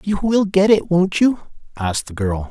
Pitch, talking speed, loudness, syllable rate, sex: 165 Hz, 215 wpm, -17 LUFS, 5.0 syllables/s, male